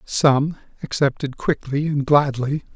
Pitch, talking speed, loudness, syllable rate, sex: 140 Hz, 110 wpm, -20 LUFS, 3.9 syllables/s, male